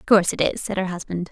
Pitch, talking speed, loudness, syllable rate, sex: 185 Hz, 275 wpm, -22 LUFS, 6.4 syllables/s, female